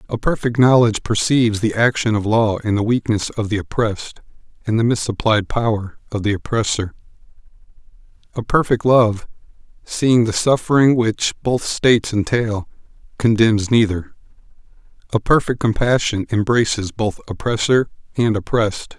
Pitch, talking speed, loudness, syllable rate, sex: 110 Hz, 130 wpm, -18 LUFS, 5.0 syllables/s, male